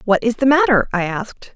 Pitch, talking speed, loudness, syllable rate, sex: 235 Hz, 230 wpm, -16 LUFS, 5.8 syllables/s, female